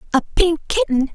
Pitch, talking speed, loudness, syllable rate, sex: 325 Hz, 155 wpm, -19 LUFS, 5.8 syllables/s, female